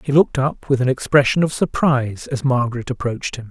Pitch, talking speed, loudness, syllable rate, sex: 130 Hz, 205 wpm, -19 LUFS, 6.2 syllables/s, male